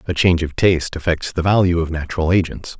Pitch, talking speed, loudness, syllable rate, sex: 85 Hz, 215 wpm, -18 LUFS, 6.4 syllables/s, male